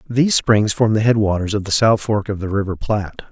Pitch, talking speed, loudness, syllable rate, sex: 105 Hz, 255 wpm, -17 LUFS, 5.7 syllables/s, male